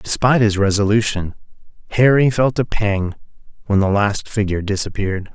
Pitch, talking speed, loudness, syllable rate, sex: 105 Hz, 135 wpm, -17 LUFS, 5.5 syllables/s, male